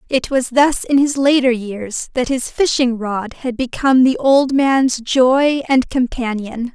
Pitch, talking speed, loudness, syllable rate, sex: 255 Hz, 170 wpm, -16 LUFS, 3.9 syllables/s, female